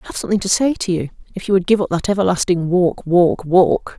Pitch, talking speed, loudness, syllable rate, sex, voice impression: 185 Hz, 255 wpm, -17 LUFS, 6.1 syllables/s, female, feminine, adult-like, relaxed, weak, fluent, slightly raspy, intellectual, unique, elegant, slightly strict, sharp